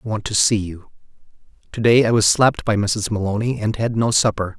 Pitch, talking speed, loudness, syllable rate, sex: 110 Hz, 220 wpm, -18 LUFS, 5.7 syllables/s, male